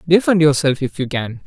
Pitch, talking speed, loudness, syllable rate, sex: 150 Hz, 205 wpm, -17 LUFS, 5.3 syllables/s, male